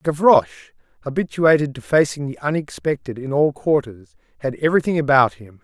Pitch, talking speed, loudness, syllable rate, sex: 140 Hz, 140 wpm, -19 LUFS, 5.5 syllables/s, male